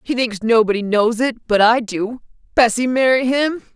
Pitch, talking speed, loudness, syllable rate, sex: 235 Hz, 175 wpm, -17 LUFS, 4.7 syllables/s, female